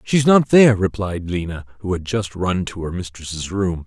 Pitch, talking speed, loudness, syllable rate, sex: 100 Hz, 215 wpm, -19 LUFS, 5.0 syllables/s, male